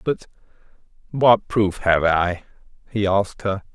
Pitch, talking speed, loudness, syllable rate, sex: 100 Hz, 130 wpm, -20 LUFS, 4.0 syllables/s, male